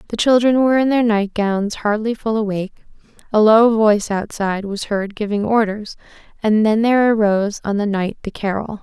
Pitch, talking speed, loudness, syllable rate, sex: 215 Hz, 175 wpm, -17 LUFS, 5.5 syllables/s, female